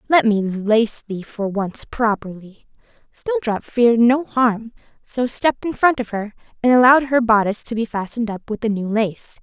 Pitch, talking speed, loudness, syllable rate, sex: 225 Hz, 185 wpm, -19 LUFS, 4.9 syllables/s, female